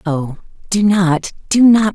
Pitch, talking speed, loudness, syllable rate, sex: 190 Hz, 155 wpm, -14 LUFS, 3.5 syllables/s, female